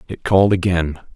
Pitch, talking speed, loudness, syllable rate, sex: 90 Hz, 155 wpm, -17 LUFS, 5.7 syllables/s, male